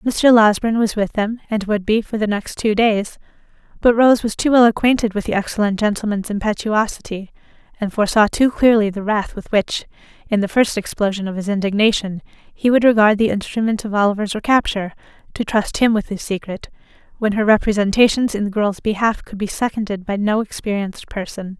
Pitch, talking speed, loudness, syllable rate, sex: 210 Hz, 185 wpm, -18 LUFS, 5.7 syllables/s, female